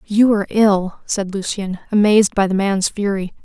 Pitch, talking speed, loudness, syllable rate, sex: 200 Hz, 175 wpm, -17 LUFS, 4.9 syllables/s, female